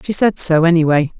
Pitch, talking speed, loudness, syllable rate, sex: 170 Hz, 200 wpm, -14 LUFS, 5.7 syllables/s, female